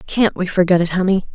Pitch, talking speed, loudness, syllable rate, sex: 185 Hz, 225 wpm, -17 LUFS, 6.0 syllables/s, female